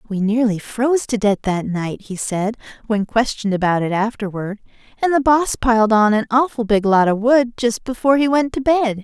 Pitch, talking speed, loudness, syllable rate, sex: 225 Hz, 205 wpm, -18 LUFS, 5.3 syllables/s, female